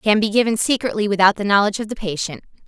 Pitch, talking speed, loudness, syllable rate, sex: 210 Hz, 225 wpm, -18 LUFS, 7.0 syllables/s, female